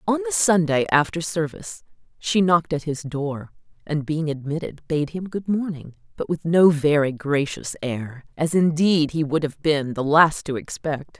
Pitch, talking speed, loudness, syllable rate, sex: 155 Hz, 170 wpm, -22 LUFS, 4.7 syllables/s, female